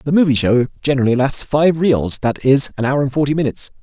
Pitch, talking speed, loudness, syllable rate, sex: 135 Hz, 220 wpm, -16 LUFS, 6.1 syllables/s, male